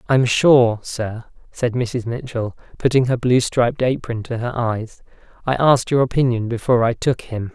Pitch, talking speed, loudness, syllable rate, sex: 120 Hz, 175 wpm, -19 LUFS, 4.8 syllables/s, male